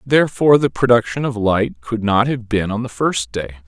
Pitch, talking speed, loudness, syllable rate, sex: 115 Hz, 210 wpm, -17 LUFS, 5.3 syllables/s, male